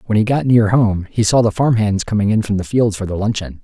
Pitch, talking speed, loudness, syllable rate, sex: 105 Hz, 295 wpm, -16 LUFS, 5.8 syllables/s, male